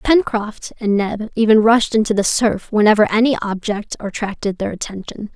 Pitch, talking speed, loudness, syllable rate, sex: 215 Hz, 155 wpm, -17 LUFS, 5.0 syllables/s, female